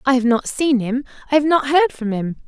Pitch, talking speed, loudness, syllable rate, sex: 265 Hz, 265 wpm, -18 LUFS, 5.4 syllables/s, female